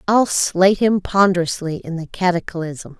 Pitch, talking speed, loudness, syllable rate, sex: 180 Hz, 140 wpm, -18 LUFS, 4.6 syllables/s, female